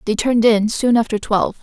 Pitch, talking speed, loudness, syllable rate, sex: 225 Hz, 220 wpm, -16 LUFS, 6.1 syllables/s, female